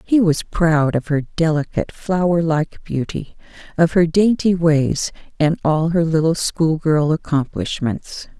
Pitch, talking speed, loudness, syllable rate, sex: 160 Hz, 135 wpm, -18 LUFS, 4.1 syllables/s, female